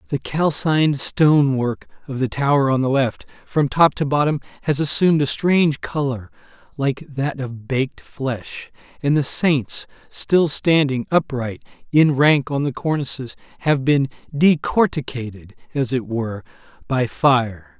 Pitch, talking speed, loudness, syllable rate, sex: 140 Hz, 145 wpm, -20 LUFS, 4.3 syllables/s, male